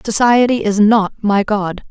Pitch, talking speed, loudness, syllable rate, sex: 210 Hz, 155 wpm, -14 LUFS, 4.2 syllables/s, female